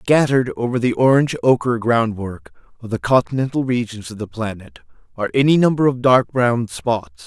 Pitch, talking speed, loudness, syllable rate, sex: 115 Hz, 165 wpm, -18 LUFS, 5.4 syllables/s, male